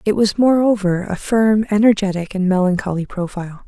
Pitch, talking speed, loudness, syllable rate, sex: 200 Hz, 145 wpm, -17 LUFS, 5.4 syllables/s, female